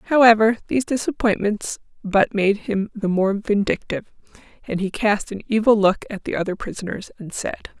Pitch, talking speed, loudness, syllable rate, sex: 210 Hz, 160 wpm, -21 LUFS, 5.2 syllables/s, female